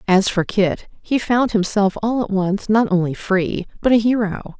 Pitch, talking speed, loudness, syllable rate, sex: 205 Hz, 195 wpm, -18 LUFS, 4.4 syllables/s, female